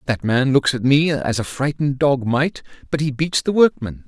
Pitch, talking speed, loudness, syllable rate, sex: 135 Hz, 220 wpm, -19 LUFS, 5.0 syllables/s, male